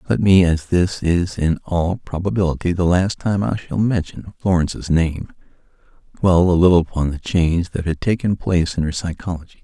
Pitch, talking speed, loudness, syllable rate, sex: 90 Hz, 180 wpm, -19 LUFS, 5.2 syllables/s, male